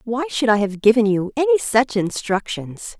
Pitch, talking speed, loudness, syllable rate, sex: 215 Hz, 180 wpm, -19 LUFS, 4.8 syllables/s, female